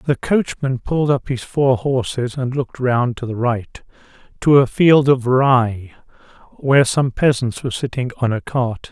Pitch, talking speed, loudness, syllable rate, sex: 130 Hz, 175 wpm, -17 LUFS, 4.5 syllables/s, male